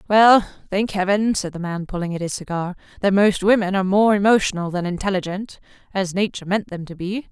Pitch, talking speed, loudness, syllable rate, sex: 190 Hz, 190 wpm, -20 LUFS, 5.9 syllables/s, female